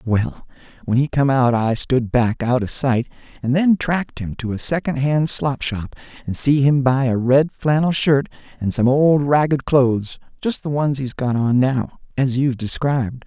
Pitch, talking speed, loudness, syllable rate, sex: 130 Hz, 190 wpm, -19 LUFS, 4.6 syllables/s, male